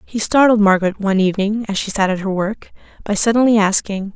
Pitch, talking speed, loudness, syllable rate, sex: 205 Hz, 200 wpm, -16 LUFS, 6.2 syllables/s, female